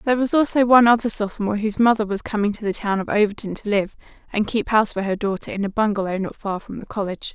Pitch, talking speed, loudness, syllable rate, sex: 210 Hz, 255 wpm, -21 LUFS, 7.1 syllables/s, female